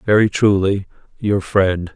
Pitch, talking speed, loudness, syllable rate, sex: 100 Hz, 125 wpm, -17 LUFS, 4.0 syllables/s, male